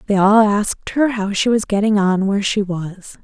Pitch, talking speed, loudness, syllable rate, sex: 205 Hz, 220 wpm, -17 LUFS, 5.0 syllables/s, female